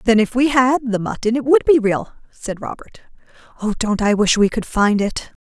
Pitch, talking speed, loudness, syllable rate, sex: 230 Hz, 220 wpm, -17 LUFS, 5.1 syllables/s, female